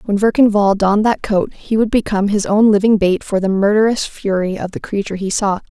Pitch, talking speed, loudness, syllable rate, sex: 205 Hz, 230 wpm, -15 LUFS, 5.9 syllables/s, female